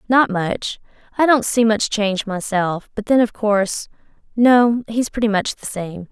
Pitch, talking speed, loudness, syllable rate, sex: 215 Hz, 175 wpm, -18 LUFS, 4.4 syllables/s, female